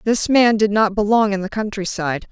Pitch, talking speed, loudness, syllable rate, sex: 210 Hz, 235 wpm, -17 LUFS, 5.0 syllables/s, female